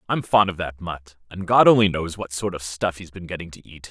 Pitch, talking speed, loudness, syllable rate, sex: 90 Hz, 275 wpm, -21 LUFS, 5.5 syllables/s, male